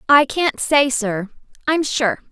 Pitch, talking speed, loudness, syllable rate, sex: 265 Hz, 155 wpm, -18 LUFS, 3.5 syllables/s, female